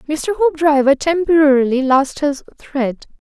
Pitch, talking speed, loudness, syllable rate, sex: 290 Hz, 110 wpm, -15 LUFS, 4.5 syllables/s, female